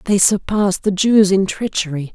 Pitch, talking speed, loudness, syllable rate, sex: 195 Hz, 170 wpm, -16 LUFS, 4.5 syllables/s, female